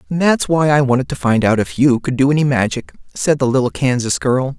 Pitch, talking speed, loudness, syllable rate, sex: 135 Hz, 235 wpm, -16 LUFS, 5.4 syllables/s, male